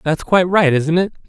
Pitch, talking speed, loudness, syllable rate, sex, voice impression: 170 Hz, 235 wpm, -15 LUFS, 5.8 syllables/s, male, masculine, slightly gender-neutral, adult-like, slightly middle-aged, slightly thin, tensed, slightly weak, bright, slightly soft, very clear, fluent, slightly cool, intellectual, very refreshing, sincere, calm, friendly, reassuring, unique, elegant, sweet, lively, kind, slightly modest